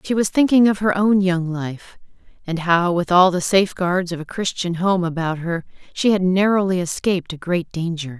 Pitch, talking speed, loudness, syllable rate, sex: 180 Hz, 200 wpm, -19 LUFS, 5.1 syllables/s, female